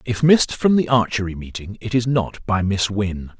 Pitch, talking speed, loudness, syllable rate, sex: 110 Hz, 210 wpm, -19 LUFS, 5.0 syllables/s, male